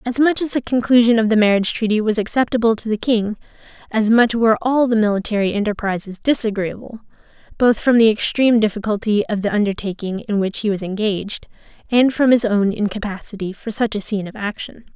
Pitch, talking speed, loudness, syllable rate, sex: 220 Hz, 185 wpm, -18 LUFS, 6.1 syllables/s, female